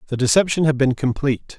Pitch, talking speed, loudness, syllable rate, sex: 140 Hz, 190 wpm, -19 LUFS, 6.6 syllables/s, male